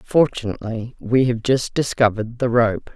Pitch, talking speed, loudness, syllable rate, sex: 120 Hz, 140 wpm, -20 LUFS, 5.0 syllables/s, female